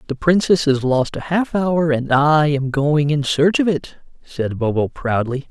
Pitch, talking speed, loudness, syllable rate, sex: 150 Hz, 195 wpm, -18 LUFS, 4.2 syllables/s, male